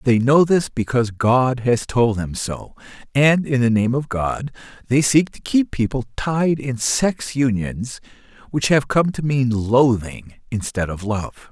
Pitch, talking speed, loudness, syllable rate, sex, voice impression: 125 Hz, 170 wpm, -19 LUFS, 3.9 syllables/s, male, masculine, adult-like, slightly refreshing, friendly, slightly kind